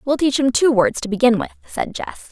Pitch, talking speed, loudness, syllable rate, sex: 255 Hz, 260 wpm, -18 LUFS, 5.3 syllables/s, female